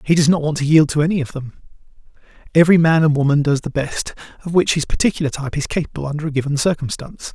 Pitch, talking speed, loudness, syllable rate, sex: 150 Hz, 230 wpm, -17 LUFS, 7.3 syllables/s, male